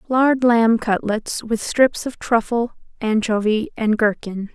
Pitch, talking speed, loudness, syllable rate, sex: 225 Hz, 130 wpm, -19 LUFS, 3.7 syllables/s, female